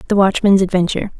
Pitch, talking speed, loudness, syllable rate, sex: 190 Hz, 150 wpm, -15 LUFS, 7.5 syllables/s, female